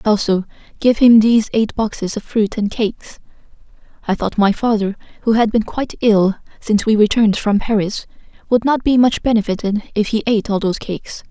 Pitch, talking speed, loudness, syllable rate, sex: 215 Hz, 185 wpm, -16 LUFS, 5.7 syllables/s, female